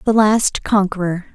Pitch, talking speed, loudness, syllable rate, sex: 200 Hz, 135 wpm, -17 LUFS, 4.3 syllables/s, female